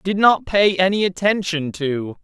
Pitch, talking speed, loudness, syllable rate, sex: 175 Hz, 160 wpm, -18 LUFS, 4.1 syllables/s, male